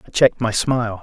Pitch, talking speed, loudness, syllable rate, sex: 115 Hz, 235 wpm, -18 LUFS, 6.9 syllables/s, male